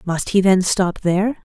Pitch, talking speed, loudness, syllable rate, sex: 190 Hz, 200 wpm, -17 LUFS, 4.5 syllables/s, female